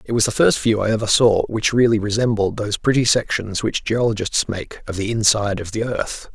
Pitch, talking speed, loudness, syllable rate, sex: 110 Hz, 220 wpm, -19 LUFS, 5.5 syllables/s, male